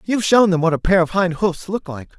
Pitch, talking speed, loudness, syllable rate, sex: 180 Hz, 300 wpm, -17 LUFS, 5.9 syllables/s, male